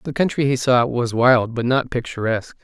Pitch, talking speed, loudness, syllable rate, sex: 125 Hz, 205 wpm, -19 LUFS, 5.2 syllables/s, male